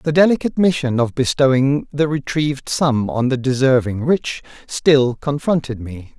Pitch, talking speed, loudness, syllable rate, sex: 135 Hz, 145 wpm, -17 LUFS, 4.6 syllables/s, male